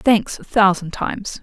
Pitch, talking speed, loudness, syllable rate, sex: 195 Hz, 170 wpm, -19 LUFS, 4.3 syllables/s, female